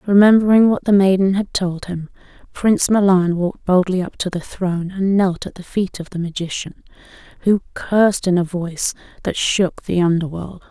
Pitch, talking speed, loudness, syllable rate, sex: 185 Hz, 180 wpm, -18 LUFS, 5.2 syllables/s, female